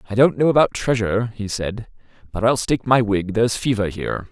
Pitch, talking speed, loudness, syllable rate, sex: 110 Hz, 210 wpm, -19 LUFS, 5.9 syllables/s, male